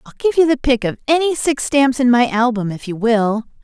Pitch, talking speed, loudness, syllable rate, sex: 250 Hz, 250 wpm, -16 LUFS, 5.4 syllables/s, female